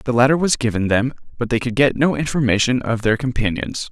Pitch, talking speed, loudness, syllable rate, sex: 125 Hz, 215 wpm, -18 LUFS, 5.8 syllables/s, male